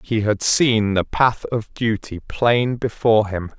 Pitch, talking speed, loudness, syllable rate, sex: 110 Hz, 165 wpm, -19 LUFS, 3.7 syllables/s, male